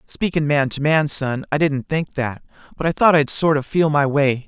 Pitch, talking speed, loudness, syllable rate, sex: 145 Hz, 240 wpm, -19 LUFS, 4.8 syllables/s, male